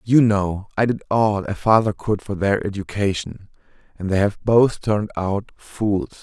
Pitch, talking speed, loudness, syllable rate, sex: 100 Hz, 175 wpm, -20 LUFS, 4.4 syllables/s, male